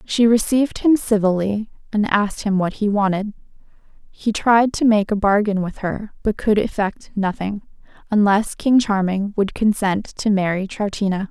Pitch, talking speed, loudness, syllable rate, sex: 205 Hz, 160 wpm, -19 LUFS, 4.7 syllables/s, female